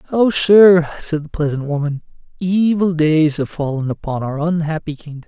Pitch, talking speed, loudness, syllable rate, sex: 160 Hz, 160 wpm, -16 LUFS, 4.9 syllables/s, male